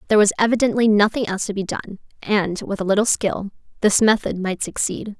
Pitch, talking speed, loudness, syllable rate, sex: 205 Hz, 195 wpm, -20 LUFS, 6.0 syllables/s, female